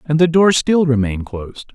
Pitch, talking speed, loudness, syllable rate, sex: 145 Hz, 205 wpm, -15 LUFS, 5.7 syllables/s, male